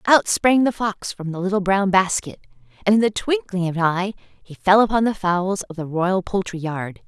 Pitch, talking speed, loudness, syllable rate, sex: 190 Hz, 220 wpm, -20 LUFS, 4.8 syllables/s, female